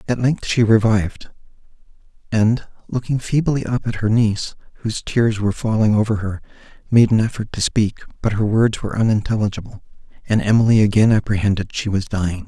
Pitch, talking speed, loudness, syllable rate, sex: 110 Hz, 165 wpm, -18 LUFS, 5.9 syllables/s, male